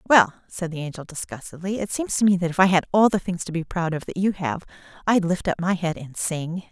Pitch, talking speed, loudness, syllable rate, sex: 175 Hz, 270 wpm, -23 LUFS, 5.9 syllables/s, female